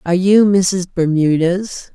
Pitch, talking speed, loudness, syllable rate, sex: 180 Hz, 125 wpm, -14 LUFS, 4.0 syllables/s, female